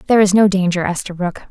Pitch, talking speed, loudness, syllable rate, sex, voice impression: 190 Hz, 200 wpm, -16 LUFS, 7.2 syllables/s, female, feminine, slightly young, slightly clear, slightly fluent, cute, refreshing, friendly